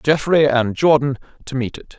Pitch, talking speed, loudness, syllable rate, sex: 135 Hz, 180 wpm, -17 LUFS, 4.7 syllables/s, male